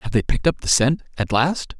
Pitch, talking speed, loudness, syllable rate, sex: 130 Hz, 235 wpm, -20 LUFS, 5.8 syllables/s, male